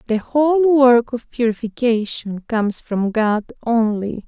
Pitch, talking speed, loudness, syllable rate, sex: 235 Hz, 125 wpm, -18 LUFS, 4.1 syllables/s, female